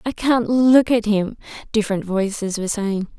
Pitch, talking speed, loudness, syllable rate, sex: 215 Hz, 170 wpm, -19 LUFS, 4.9 syllables/s, female